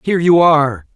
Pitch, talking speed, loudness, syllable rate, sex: 155 Hz, 190 wpm, -12 LUFS, 6.3 syllables/s, male